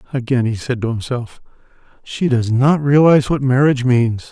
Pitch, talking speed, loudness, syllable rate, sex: 130 Hz, 165 wpm, -16 LUFS, 5.2 syllables/s, male